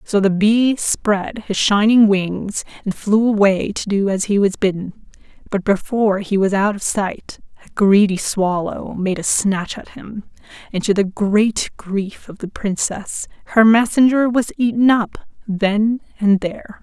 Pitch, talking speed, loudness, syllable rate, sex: 205 Hz, 170 wpm, -17 LUFS, 4.1 syllables/s, female